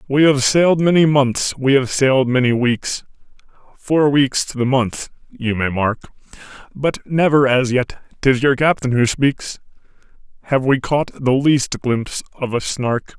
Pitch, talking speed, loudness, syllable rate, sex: 135 Hz, 165 wpm, -17 LUFS, 3.5 syllables/s, male